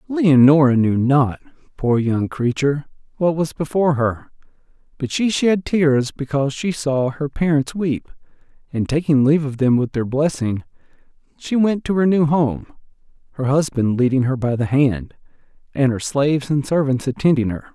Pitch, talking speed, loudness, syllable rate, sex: 140 Hz, 160 wpm, -18 LUFS, 4.8 syllables/s, male